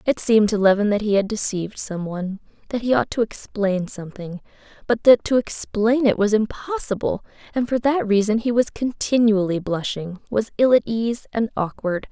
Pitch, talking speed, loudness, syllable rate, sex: 215 Hz, 180 wpm, -21 LUFS, 5.2 syllables/s, female